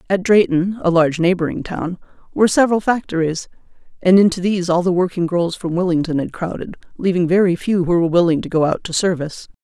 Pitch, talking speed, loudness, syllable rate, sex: 180 Hz, 195 wpm, -17 LUFS, 6.3 syllables/s, female